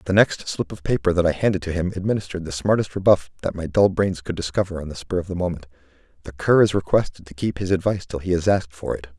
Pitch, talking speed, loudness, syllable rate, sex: 90 Hz, 260 wpm, -22 LUFS, 6.8 syllables/s, male